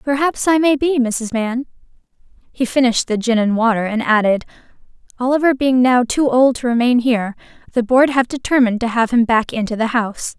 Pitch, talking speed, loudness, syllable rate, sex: 245 Hz, 190 wpm, -16 LUFS, 5.6 syllables/s, female